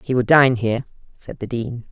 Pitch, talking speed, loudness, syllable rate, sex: 120 Hz, 220 wpm, -18 LUFS, 5.4 syllables/s, female